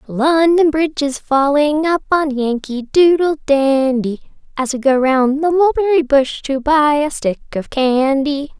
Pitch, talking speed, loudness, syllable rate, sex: 285 Hz, 155 wpm, -15 LUFS, 3.9 syllables/s, female